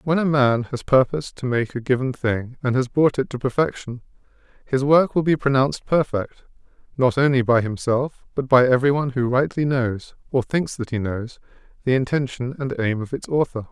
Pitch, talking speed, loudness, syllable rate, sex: 130 Hz, 190 wpm, -21 LUFS, 5.3 syllables/s, male